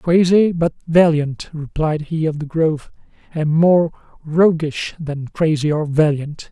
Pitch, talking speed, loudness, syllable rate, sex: 160 Hz, 140 wpm, -18 LUFS, 4.0 syllables/s, male